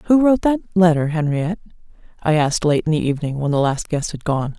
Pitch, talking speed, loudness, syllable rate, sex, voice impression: 165 Hz, 225 wpm, -19 LUFS, 6.4 syllables/s, female, very feminine, slightly middle-aged, slightly thin, slightly tensed, powerful, slightly bright, soft, slightly muffled, fluent, cool, intellectual, very refreshing, sincere, very calm, friendly, reassuring, slightly unique, elegant, slightly wild, sweet, lively, kind, slightly modest